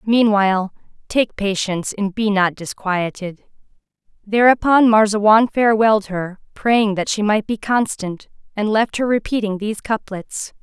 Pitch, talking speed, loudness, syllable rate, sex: 210 Hz, 130 wpm, -18 LUFS, 4.6 syllables/s, female